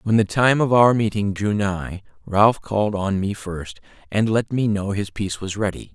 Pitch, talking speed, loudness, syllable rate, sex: 105 Hz, 210 wpm, -20 LUFS, 4.7 syllables/s, male